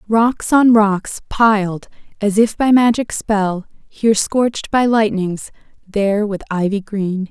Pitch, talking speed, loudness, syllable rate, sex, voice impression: 210 Hz, 140 wpm, -16 LUFS, 3.7 syllables/s, female, very feminine, slightly young, slightly adult-like, very thin, slightly relaxed, slightly weak, bright, slightly soft, slightly clear, slightly fluent, cute, intellectual, refreshing, slightly sincere, very calm, friendly, reassuring, slightly unique, very elegant, slightly sweet, lively, kind, slightly modest